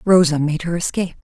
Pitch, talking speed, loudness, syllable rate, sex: 165 Hz, 195 wpm, -18 LUFS, 6.5 syllables/s, female